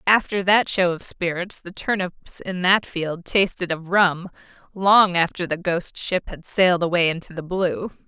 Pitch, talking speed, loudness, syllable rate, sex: 180 Hz, 180 wpm, -21 LUFS, 4.4 syllables/s, female